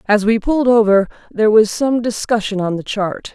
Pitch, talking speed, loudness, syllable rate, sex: 215 Hz, 195 wpm, -16 LUFS, 5.4 syllables/s, female